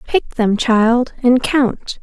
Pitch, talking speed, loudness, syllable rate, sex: 245 Hz, 150 wpm, -15 LUFS, 2.7 syllables/s, female